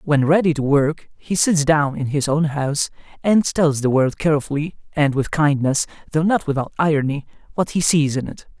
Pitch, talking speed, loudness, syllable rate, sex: 150 Hz, 195 wpm, -19 LUFS, 5.1 syllables/s, male